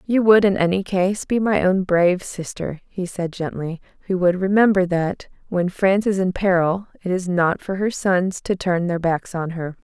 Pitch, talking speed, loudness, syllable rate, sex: 185 Hz, 205 wpm, -20 LUFS, 4.7 syllables/s, female